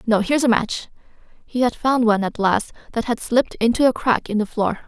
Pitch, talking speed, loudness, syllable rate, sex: 230 Hz, 235 wpm, -20 LUFS, 5.7 syllables/s, female